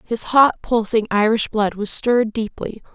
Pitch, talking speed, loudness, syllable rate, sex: 220 Hz, 165 wpm, -18 LUFS, 4.5 syllables/s, female